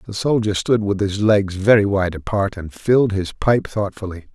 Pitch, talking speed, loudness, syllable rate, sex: 100 Hz, 195 wpm, -18 LUFS, 4.9 syllables/s, male